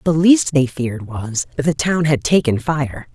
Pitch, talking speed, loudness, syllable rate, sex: 145 Hz, 210 wpm, -17 LUFS, 4.5 syllables/s, female